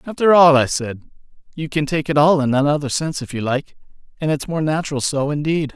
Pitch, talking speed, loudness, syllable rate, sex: 150 Hz, 220 wpm, -18 LUFS, 6.0 syllables/s, male